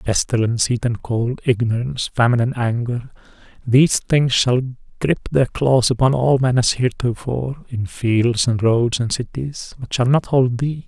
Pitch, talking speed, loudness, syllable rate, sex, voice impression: 125 Hz, 165 wpm, -18 LUFS, 4.8 syllables/s, male, masculine, middle-aged, slightly thin, weak, slightly soft, fluent, calm, reassuring, kind, modest